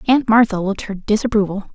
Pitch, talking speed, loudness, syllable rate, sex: 210 Hz, 170 wpm, -17 LUFS, 6.3 syllables/s, female